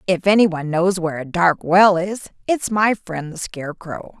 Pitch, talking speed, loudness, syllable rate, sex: 180 Hz, 185 wpm, -18 LUFS, 4.7 syllables/s, female